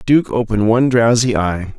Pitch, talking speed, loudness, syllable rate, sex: 115 Hz, 170 wpm, -15 LUFS, 5.5 syllables/s, male